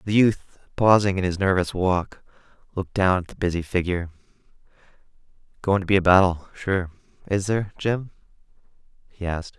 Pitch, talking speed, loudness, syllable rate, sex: 95 Hz, 150 wpm, -23 LUFS, 5.7 syllables/s, male